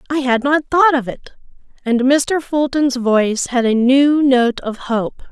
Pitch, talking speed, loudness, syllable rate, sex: 260 Hz, 180 wpm, -15 LUFS, 4.0 syllables/s, female